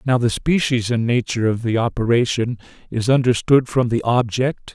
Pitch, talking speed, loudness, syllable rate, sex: 120 Hz, 165 wpm, -19 LUFS, 5.1 syllables/s, male